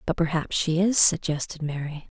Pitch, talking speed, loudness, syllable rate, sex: 165 Hz, 165 wpm, -23 LUFS, 5.0 syllables/s, female